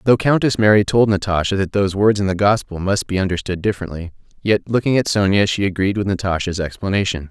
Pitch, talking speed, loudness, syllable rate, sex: 100 Hz, 195 wpm, -18 LUFS, 6.3 syllables/s, male